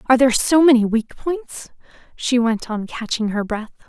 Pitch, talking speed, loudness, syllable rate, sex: 245 Hz, 185 wpm, -19 LUFS, 5.0 syllables/s, female